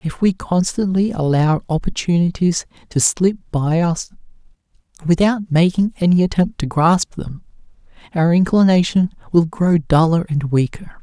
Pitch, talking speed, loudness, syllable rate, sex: 170 Hz, 125 wpm, -17 LUFS, 4.6 syllables/s, male